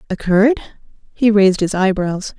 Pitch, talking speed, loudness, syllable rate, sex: 200 Hz, 125 wpm, -15 LUFS, 5.8 syllables/s, female